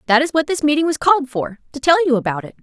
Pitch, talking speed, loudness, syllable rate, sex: 285 Hz, 275 wpm, -17 LUFS, 7.0 syllables/s, female